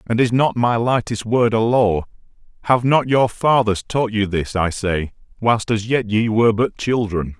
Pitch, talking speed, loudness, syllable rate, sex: 110 Hz, 195 wpm, -18 LUFS, 4.4 syllables/s, male